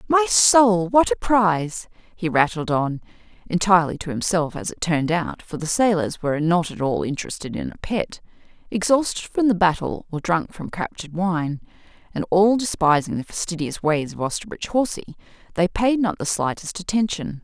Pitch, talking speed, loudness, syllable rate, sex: 180 Hz, 170 wpm, -21 LUFS, 5.3 syllables/s, female